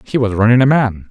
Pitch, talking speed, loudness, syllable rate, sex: 115 Hz, 270 wpm, -13 LUFS, 5.9 syllables/s, male